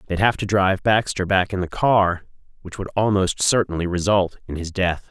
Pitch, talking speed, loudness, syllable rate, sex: 95 Hz, 200 wpm, -20 LUFS, 5.3 syllables/s, male